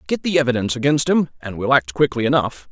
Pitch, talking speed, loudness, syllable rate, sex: 135 Hz, 220 wpm, -19 LUFS, 6.5 syllables/s, male